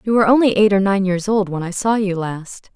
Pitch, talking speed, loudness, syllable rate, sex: 200 Hz, 285 wpm, -17 LUFS, 5.7 syllables/s, female